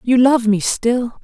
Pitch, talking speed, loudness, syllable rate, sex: 240 Hz, 195 wpm, -15 LUFS, 3.8 syllables/s, female